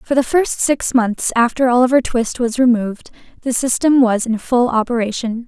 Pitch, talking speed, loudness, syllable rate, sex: 245 Hz, 175 wpm, -16 LUFS, 5.0 syllables/s, female